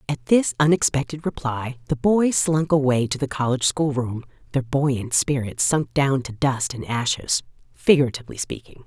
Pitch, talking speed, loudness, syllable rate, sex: 135 Hz, 150 wpm, -22 LUFS, 4.9 syllables/s, female